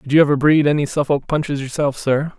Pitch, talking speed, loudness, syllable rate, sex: 145 Hz, 225 wpm, -17 LUFS, 6.2 syllables/s, male